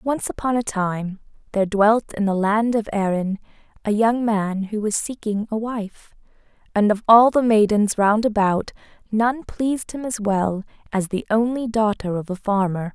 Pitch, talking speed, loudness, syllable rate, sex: 215 Hz, 175 wpm, -21 LUFS, 4.5 syllables/s, female